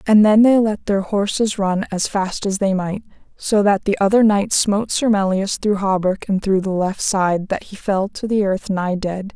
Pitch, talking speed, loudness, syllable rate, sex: 200 Hz, 225 wpm, -18 LUFS, 4.6 syllables/s, female